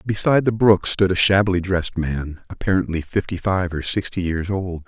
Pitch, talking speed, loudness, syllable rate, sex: 90 Hz, 185 wpm, -20 LUFS, 5.4 syllables/s, male